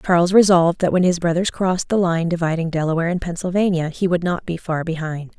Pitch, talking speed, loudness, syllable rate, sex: 175 Hz, 210 wpm, -19 LUFS, 6.4 syllables/s, female